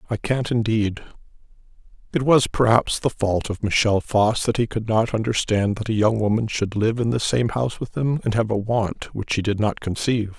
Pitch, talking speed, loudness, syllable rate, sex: 110 Hz, 215 wpm, -21 LUFS, 5.1 syllables/s, male